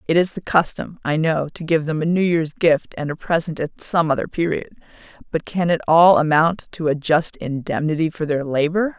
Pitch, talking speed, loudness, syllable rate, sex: 160 Hz, 215 wpm, -20 LUFS, 5.1 syllables/s, female